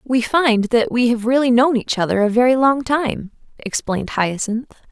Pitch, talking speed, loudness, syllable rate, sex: 240 Hz, 185 wpm, -17 LUFS, 4.9 syllables/s, female